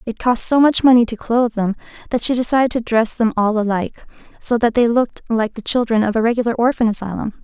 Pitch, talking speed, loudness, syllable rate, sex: 230 Hz, 225 wpm, -17 LUFS, 6.3 syllables/s, female